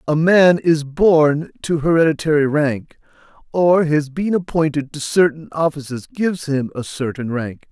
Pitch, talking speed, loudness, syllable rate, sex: 150 Hz, 150 wpm, -17 LUFS, 4.4 syllables/s, male